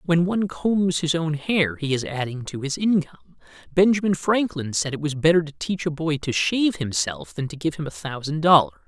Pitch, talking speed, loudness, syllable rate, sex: 155 Hz, 215 wpm, -22 LUFS, 5.4 syllables/s, male